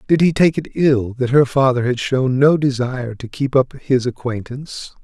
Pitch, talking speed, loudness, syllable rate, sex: 130 Hz, 205 wpm, -17 LUFS, 4.8 syllables/s, male